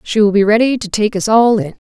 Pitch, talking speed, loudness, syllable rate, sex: 210 Hz, 285 wpm, -13 LUFS, 5.9 syllables/s, female